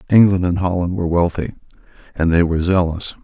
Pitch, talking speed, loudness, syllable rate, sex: 90 Hz, 165 wpm, -17 LUFS, 6.5 syllables/s, male